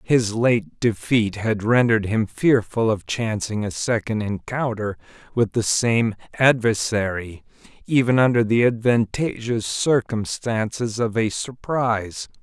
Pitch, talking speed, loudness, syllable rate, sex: 115 Hz, 110 wpm, -21 LUFS, 4.0 syllables/s, male